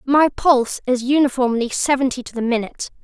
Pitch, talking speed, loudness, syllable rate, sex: 260 Hz, 160 wpm, -18 LUFS, 5.8 syllables/s, female